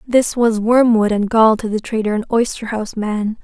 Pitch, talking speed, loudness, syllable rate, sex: 220 Hz, 210 wpm, -16 LUFS, 5.0 syllables/s, female